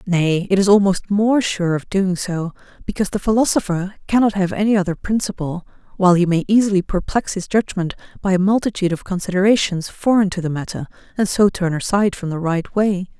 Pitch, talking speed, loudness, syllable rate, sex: 190 Hz, 185 wpm, -18 LUFS, 5.9 syllables/s, female